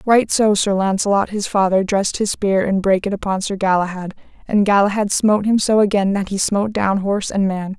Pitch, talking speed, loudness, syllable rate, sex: 200 Hz, 215 wpm, -17 LUFS, 5.7 syllables/s, female